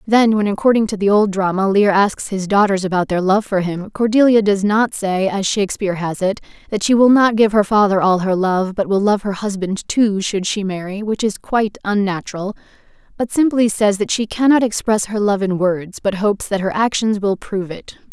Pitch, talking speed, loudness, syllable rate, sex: 205 Hz, 215 wpm, -17 LUFS, 5.3 syllables/s, female